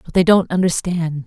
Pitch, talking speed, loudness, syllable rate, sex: 175 Hz, 190 wpm, -17 LUFS, 5.1 syllables/s, female